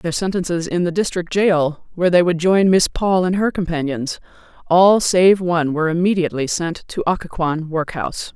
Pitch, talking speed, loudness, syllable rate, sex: 175 Hz, 170 wpm, -18 LUFS, 5.2 syllables/s, female